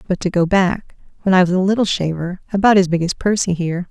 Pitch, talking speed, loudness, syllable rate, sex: 185 Hz, 230 wpm, -17 LUFS, 6.2 syllables/s, female